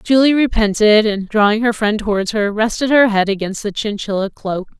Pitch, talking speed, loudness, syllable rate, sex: 215 Hz, 190 wpm, -16 LUFS, 5.1 syllables/s, female